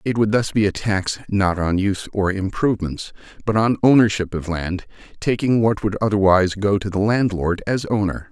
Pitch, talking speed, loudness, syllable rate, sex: 100 Hz, 190 wpm, -20 LUFS, 5.2 syllables/s, male